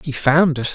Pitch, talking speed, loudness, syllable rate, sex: 145 Hz, 240 wpm, -16 LUFS, 4.7 syllables/s, male